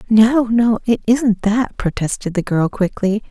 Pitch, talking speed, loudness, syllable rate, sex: 215 Hz, 165 wpm, -17 LUFS, 4.1 syllables/s, female